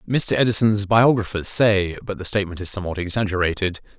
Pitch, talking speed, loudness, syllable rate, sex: 100 Hz, 150 wpm, -20 LUFS, 6.1 syllables/s, male